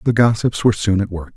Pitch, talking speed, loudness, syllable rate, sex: 105 Hz, 265 wpm, -17 LUFS, 6.5 syllables/s, male